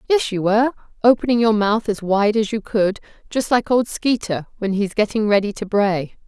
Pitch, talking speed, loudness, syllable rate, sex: 215 Hz, 200 wpm, -19 LUFS, 5.1 syllables/s, female